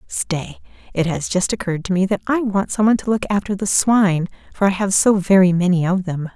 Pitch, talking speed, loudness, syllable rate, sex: 190 Hz, 225 wpm, -18 LUFS, 5.8 syllables/s, female